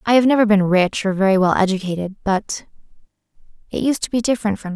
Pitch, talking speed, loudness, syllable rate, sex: 205 Hz, 200 wpm, -18 LUFS, 6.8 syllables/s, female